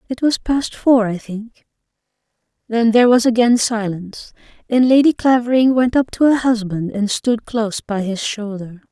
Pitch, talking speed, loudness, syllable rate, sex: 230 Hz, 170 wpm, -16 LUFS, 4.8 syllables/s, female